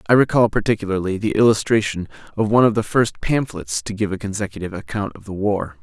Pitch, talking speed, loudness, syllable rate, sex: 105 Hz, 195 wpm, -20 LUFS, 6.4 syllables/s, male